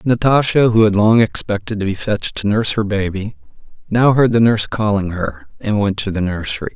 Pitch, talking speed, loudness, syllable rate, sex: 105 Hz, 205 wpm, -16 LUFS, 5.7 syllables/s, male